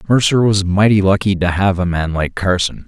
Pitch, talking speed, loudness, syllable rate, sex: 95 Hz, 210 wpm, -15 LUFS, 5.2 syllables/s, male